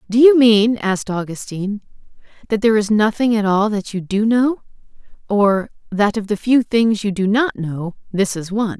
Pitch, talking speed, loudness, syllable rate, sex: 210 Hz, 190 wpm, -17 LUFS, 5.1 syllables/s, female